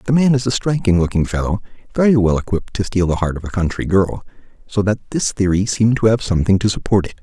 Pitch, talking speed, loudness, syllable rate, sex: 105 Hz, 240 wpm, -17 LUFS, 6.4 syllables/s, male